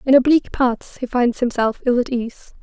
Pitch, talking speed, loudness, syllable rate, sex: 250 Hz, 205 wpm, -19 LUFS, 5.0 syllables/s, female